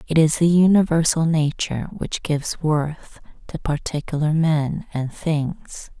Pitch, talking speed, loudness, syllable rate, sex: 155 Hz, 130 wpm, -21 LUFS, 4.0 syllables/s, female